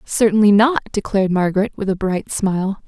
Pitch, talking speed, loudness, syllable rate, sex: 200 Hz, 165 wpm, -17 LUFS, 5.9 syllables/s, female